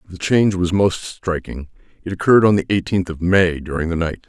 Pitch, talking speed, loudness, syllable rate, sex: 90 Hz, 210 wpm, -18 LUFS, 5.7 syllables/s, male